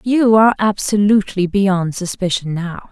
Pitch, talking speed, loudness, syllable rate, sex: 195 Hz, 125 wpm, -16 LUFS, 4.7 syllables/s, female